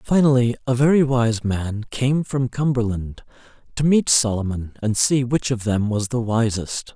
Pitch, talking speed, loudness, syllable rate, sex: 120 Hz, 165 wpm, -20 LUFS, 4.4 syllables/s, male